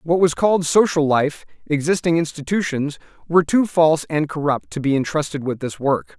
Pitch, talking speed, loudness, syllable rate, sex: 155 Hz, 175 wpm, -19 LUFS, 5.3 syllables/s, male